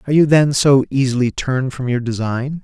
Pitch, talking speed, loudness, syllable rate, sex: 135 Hz, 205 wpm, -16 LUFS, 5.8 syllables/s, male